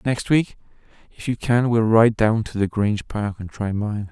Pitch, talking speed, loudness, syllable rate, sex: 110 Hz, 220 wpm, -21 LUFS, 4.7 syllables/s, male